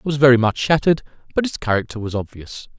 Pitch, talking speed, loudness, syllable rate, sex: 130 Hz, 215 wpm, -19 LUFS, 6.8 syllables/s, male